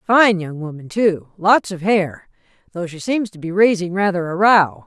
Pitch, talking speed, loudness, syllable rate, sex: 185 Hz, 175 wpm, -17 LUFS, 4.5 syllables/s, female